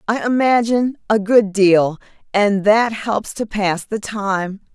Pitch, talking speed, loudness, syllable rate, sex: 210 Hz, 150 wpm, -17 LUFS, 3.7 syllables/s, female